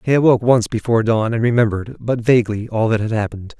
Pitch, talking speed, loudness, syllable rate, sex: 115 Hz, 215 wpm, -17 LUFS, 7.0 syllables/s, male